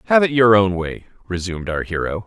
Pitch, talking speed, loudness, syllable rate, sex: 105 Hz, 210 wpm, -18 LUFS, 6.0 syllables/s, male